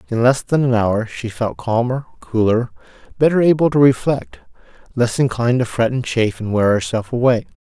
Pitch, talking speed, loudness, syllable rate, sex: 120 Hz, 175 wpm, -17 LUFS, 5.4 syllables/s, male